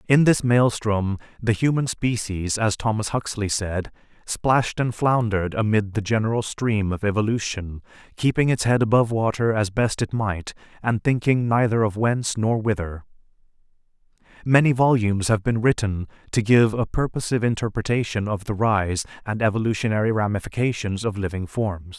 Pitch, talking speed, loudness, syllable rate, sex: 110 Hz, 145 wpm, -22 LUFS, 5.2 syllables/s, male